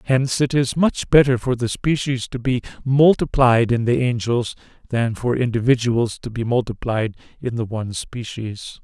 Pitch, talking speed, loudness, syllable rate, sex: 120 Hz, 165 wpm, -20 LUFS, 4.7 syllables/s, male